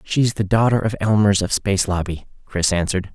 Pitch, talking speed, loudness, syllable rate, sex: 100 Hz, 190 wpm, -19 LUFS, 5.6 syllables/s, male